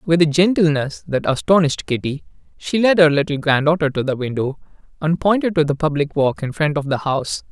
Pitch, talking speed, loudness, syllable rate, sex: 155 Hz, 200 wpm, -18 LUFS, 5.7 syllables/s, male